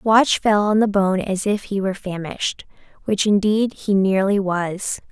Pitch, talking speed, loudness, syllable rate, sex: 200 Hz, 175 wpm, -19 LUFS, 4.4 syllables/s, female